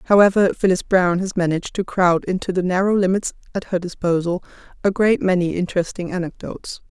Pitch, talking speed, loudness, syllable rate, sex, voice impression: 185 Hz, 165 wpm, -20 LUFS, 6.1 syllables/s, female, feminine, adult-like, relaxed, slightly weak, slightly dark, soft, muffled, fluent, raspy, calm, slightly reassuring, elegant, slightly kind, modest